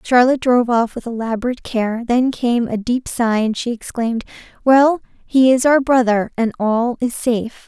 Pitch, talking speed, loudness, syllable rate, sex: 240 Hz, 170 wpm, -17 LUFS, 5.0 syllables/s, female